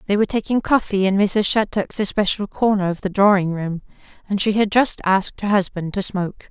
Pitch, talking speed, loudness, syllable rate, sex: 200 Hz, 205 wpm, -19 LUFS, 5.7 syllables/s, female